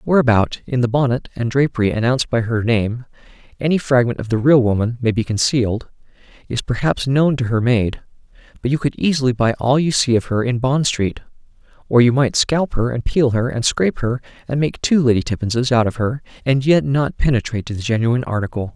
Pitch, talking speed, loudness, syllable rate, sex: 125 Hz, 210 wpm, -18 LUFS, 5.8 syllables/s, male